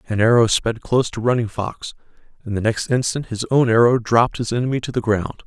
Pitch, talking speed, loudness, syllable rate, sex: 115 Hz, 220 wpm, -19 LUFS, 6.1 syllables/s, male